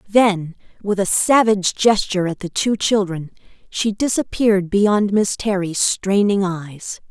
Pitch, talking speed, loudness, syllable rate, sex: 200 Hz, 135 wpm, -18 LUFS, 4.2 syllables/s, female